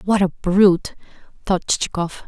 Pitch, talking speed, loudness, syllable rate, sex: 185 Hz, 130 wpm, -19 LUFS, 5.0 syllables/s, female